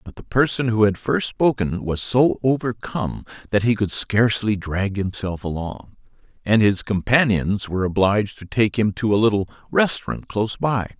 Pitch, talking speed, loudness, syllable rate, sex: 105 Hz, 170 wpm, -21 LUFS, 5.0 syllables/s, male